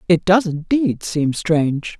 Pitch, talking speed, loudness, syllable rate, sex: 175 Hz, 150 wpm, -18 LUFS, 3.9 syllables/s, female